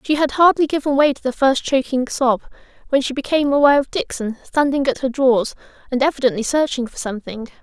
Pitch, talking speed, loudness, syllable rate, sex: 270 Hz, 195 wpm, -18 LUFS, 6.2 syllables/s, female